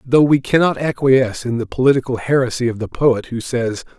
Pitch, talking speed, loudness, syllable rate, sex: 125 Hz, 195 wpm, -17 LUFS, 5.6 syllables/s, male